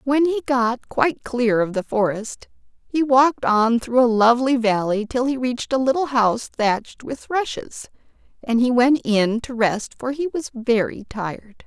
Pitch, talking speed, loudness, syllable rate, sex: 245 Hz, 180 wpm, -20 LUFS, 4.6 syllables/s, female